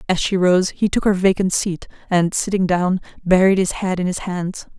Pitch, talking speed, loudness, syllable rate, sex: 185 Hz, 215 wpm, -18 LUFS, 5.0 syllables/s, female